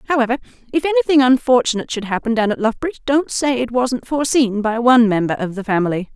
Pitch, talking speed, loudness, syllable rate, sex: 245 Hz, 195 wpm, -17 LUFS, 7.3 syllables/s, female